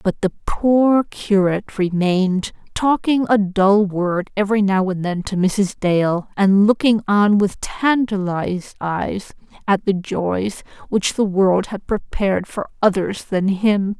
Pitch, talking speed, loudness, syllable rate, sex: 200 Hz, 145 wpm, -18 LUFS, 3.8 syllables/s, female